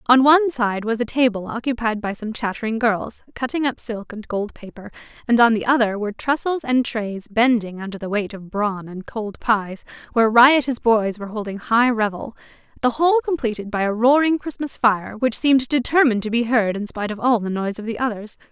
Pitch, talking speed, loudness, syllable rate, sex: 230 Hz, 205 wpm, -20 LUFS, 5.5 syllables/s, female